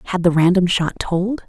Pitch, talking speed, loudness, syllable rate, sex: 180 Hz, 205 wpm, -17 LUFS, 5.5 syllables/s, female